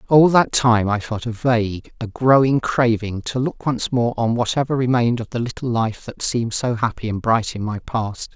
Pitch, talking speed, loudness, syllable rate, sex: 120 Hz, 215 wpm, -20 LUFS, 5.0 syllables/s, male